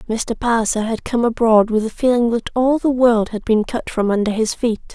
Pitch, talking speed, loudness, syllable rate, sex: 230 Hz, 230 wpm, -17 LUFS, 5.2 syllables/s, female